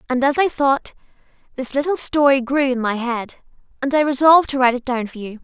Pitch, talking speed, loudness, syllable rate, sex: 265 Hz, 220 wpm, -18 LUFS, 6.0 syllables/s, female